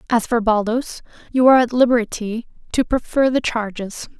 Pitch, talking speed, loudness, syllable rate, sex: 230 Hz, 155 wpm, -18 LUFS, 5.0 syllables/s, female